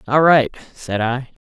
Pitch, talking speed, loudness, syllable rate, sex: 130 Hz, 160 wpm, -17 LUFS, 3.9 syllables/s, male